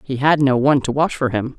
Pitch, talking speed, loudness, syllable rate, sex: 135 Hz, 305 wpm, -17 LUFS, 6.0 syllables/s, female